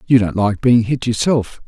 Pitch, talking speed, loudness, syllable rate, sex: 115 Hz, 215 wpm, -16 LUFS, 4.6 syllables/s, male